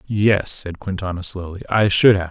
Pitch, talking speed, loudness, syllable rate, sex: 95 Hz, 180 wpm, -19 LUFS, 4.7 syllables/s, male